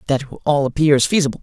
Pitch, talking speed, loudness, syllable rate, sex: 140 Hz, 170 wpm, -17 LUFS, 6.7 syllables/s, male